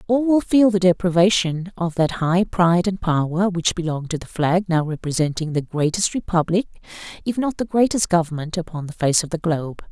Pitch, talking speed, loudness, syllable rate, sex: 175 Hz, 195 wpm, -20 LUFS, 5.4 syllables/s, female